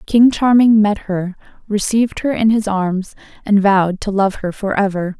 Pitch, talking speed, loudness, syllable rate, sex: 205 Hz, 185 wpm, -15 LUFS, 4.7 syllables/s, female